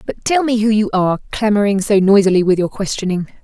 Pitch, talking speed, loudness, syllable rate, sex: 205 Hz, 210 wpm, -15 LUFS, 6.2 syllables/s, female